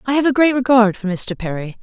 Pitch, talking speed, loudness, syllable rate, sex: 230 Hz, 265 wpm, -16 LUFS, 5.9 syllables/s, female